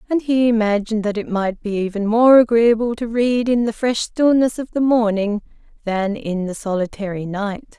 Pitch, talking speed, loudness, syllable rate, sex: 220 Hz, 185 wpm, -18 LUFS, 5.0 syllables/s, female